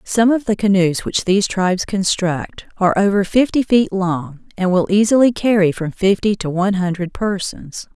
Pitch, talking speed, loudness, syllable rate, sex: 195 Hz, 175 wpm, -17 LUFS, 5.0 syllables/s, female